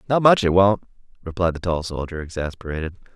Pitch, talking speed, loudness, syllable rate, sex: 90 Hz, 170 wpm, -21 LUFS, 6.1 syllables/s, male